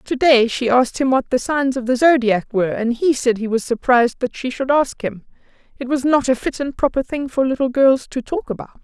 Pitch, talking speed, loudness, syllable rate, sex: 255 Hz, 245 wpm, -18 LUFS, 5.6 syllables/s, female